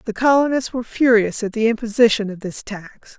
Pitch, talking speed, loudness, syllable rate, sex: 225 Hz, 190 wpm, -18 LUFS, 5.6 syllables/s, female